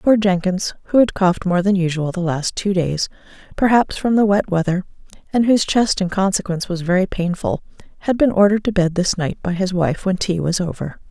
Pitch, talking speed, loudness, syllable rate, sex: 190 Hz, 210 wpm, -18 LUFS, 5.6 syllables/s, female